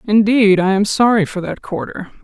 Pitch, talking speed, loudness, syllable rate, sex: 205 Hz, 190 wpm, -15 LUFS, 4.9 syllables/s, female